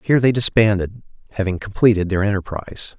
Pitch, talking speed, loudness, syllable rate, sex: 100 Hz, 140 wpm, -18 LUFS, 6.3 syllables/s, male